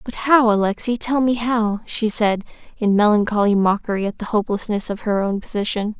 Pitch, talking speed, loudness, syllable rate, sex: 215 Hz, 180 wpm, -19 LUFS, 5.4 syllables/s, female